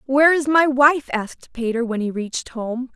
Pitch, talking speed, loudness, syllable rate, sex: 260 Hz, 205 wpm, -19 LUFS, 5.0 syllables/s, female